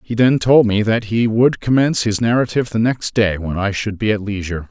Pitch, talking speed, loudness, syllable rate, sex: 110 Hz, 240 wpm, -16 LUFS, 5.7 syllables/s, male